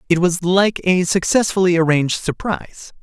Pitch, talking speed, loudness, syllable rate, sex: 175 Hz, 140 wpm, -17 LUFS, 5.2 syllables/s, male